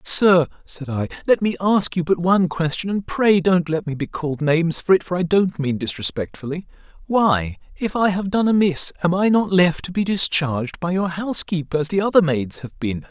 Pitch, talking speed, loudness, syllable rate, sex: 170 Hz, 220 wpm, -20 LUFS, 5.4 syllables/s, male